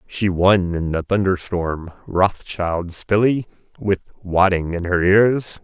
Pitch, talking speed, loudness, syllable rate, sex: 95 Hz, 130 wpm, -19 LUFS, 3.5 syllables/s, male